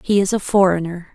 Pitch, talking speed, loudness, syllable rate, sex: 185 Hz, 210 wpm, -17 LUFS, 5.7 syllables/s, female